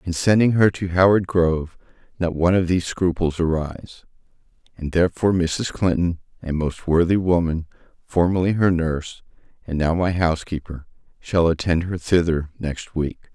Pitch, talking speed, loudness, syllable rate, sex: 85 Hz, 150 wpm, -21 LUFS, 5.2 syllables/s, male